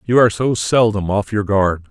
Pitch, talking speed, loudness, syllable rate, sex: 105 Hz, 220 wpm, -16 LUFS, 5.1 syllables/s, male